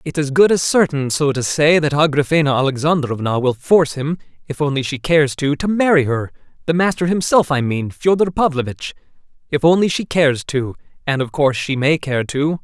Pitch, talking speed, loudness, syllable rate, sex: 145 Hz, 185 wpm, -17 LUFS, 5.5 syllables/s, male